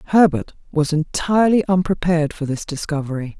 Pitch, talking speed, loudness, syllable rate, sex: 165 Hz, 125 wpm, -19 LUFS, 5.8 syllables/s, female